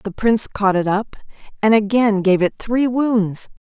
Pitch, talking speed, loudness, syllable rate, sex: 210 Hz, 180 wpm, -17 LUFS, 4.3 syllables/s, female